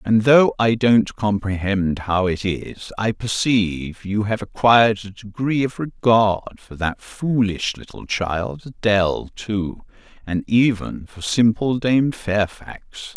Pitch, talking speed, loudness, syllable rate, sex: 105 Hz, 135 wpm, -20 LUFS, 3.7 syllables/s, male